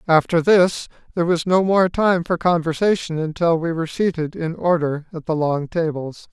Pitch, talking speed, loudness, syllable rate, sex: 165 Hz, 180 wpm, -19 LUFS, 5.0 syllables/s, male